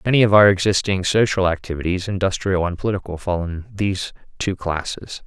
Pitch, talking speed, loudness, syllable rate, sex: 95 Hz, 160 wpm, -20 LUFS, 5.8 syllables/s, male